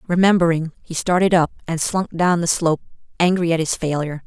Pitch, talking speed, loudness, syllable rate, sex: 170 Hz, 185 wpm, -19 LUFS, 6.0 syllables/s, female